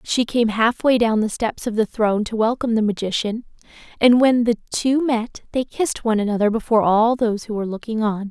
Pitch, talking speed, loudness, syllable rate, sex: 225 Hz, 210 wpm, -19 LUFS, 6.0 syllables/s, female